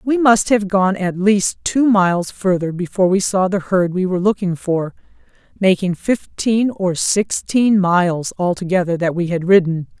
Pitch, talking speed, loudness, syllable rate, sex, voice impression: 190 Hz, 170 wpm, -17 LUFS, 4.6 syllables/s, female, feminine, adult-like, clear, sincere, slightly friendly, reassuring